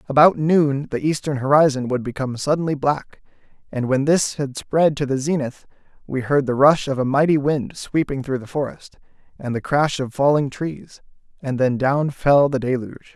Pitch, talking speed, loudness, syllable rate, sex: 140 Hz, 185 wpm, -20 LUFS, 5.0 syllables/s, male